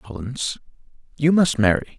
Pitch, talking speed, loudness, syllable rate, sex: 130 Hz, 120 wpm, -20 LUFS, 4.8 syllables/s, male